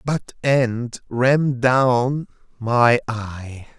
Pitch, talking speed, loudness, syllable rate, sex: 125 Hz, 95 wpm, -19 LUFS, 2.0 syllables/s, male